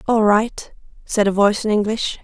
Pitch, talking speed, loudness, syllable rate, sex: 210 Hz, 190 wpm, -18 LUFS, 5.2 syllables/s, female